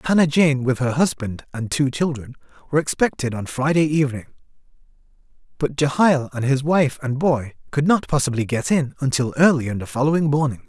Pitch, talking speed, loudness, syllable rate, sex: 140 Hz, 175 wpm, -20 LUFS, 5.7 syllables/s, male